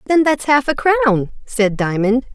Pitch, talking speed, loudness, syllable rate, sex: 240 Hz, 180 wpm, -16 LUFS, 4.1 syllables/s, female